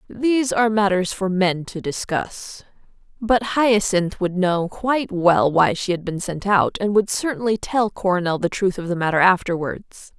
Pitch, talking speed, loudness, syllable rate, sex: 195 Hz, 175 wpm, -20 LUFS, 4.6 syllables/s, female